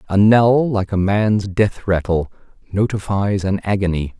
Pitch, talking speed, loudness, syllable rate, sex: 100 Hz, 145 wpm, -17 LUFS, 4.2 syllables/s, male